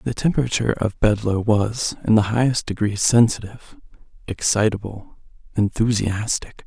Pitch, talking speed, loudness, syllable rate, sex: 110 Hz, 110 wpm, -20 LUFS, 5.0 syllables/s, male